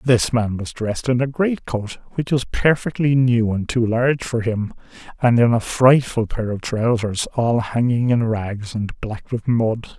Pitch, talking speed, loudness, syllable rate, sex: 120 Hz, 190 wpm, -20 LUFS, 4.2 syllables/s, male